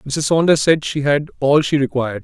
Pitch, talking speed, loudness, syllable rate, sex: 145 Hz, 215 wpm, -16 LUFS, 5.1 syllables/s, male